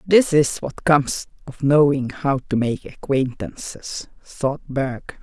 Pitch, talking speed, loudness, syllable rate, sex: 140 Hz, 140 wpm, -21 LUFS, 3.7 syllables/s, female